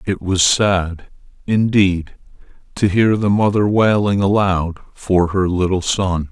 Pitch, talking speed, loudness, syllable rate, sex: 95 Hz, 135 wpm, -16 LUFS, 3.7 syllables/s, male